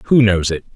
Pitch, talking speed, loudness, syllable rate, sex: 105 Hz, 240 wpm, -15 LUFS, 4.8 syllables/s, male